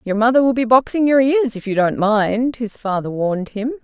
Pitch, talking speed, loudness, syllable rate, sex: 230 Hz, 235 wpm, -17 LUFS, 5.2 syllables/s, female